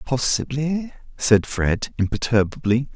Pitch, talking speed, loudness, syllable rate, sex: 125 Hz, 80 wpm, -21 LUFS, 3.9 syllables/s, male